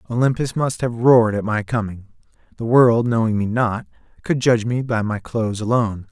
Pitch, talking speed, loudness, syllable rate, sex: 115 Hz, 185 wpm, -19 LUFS, 5.6 syllables/s, male